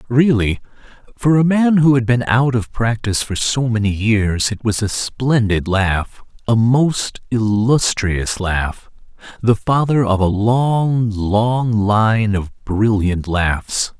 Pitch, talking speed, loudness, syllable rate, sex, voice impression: 115 Hz, 140 wpm, -16 LUFS, 3.4 syllables/s, male, very masculine, very adult-like, slightly thick, cool, sincere, slightly calm